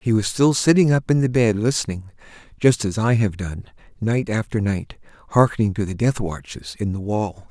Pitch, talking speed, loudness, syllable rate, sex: 110 Hz, 190 wpm, -20 LUFS, 5.1 syllables/s, male